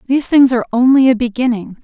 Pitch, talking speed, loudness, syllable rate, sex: 245 Hz, 195 wpm, -13 LUFS, 7.1 syllables/s, female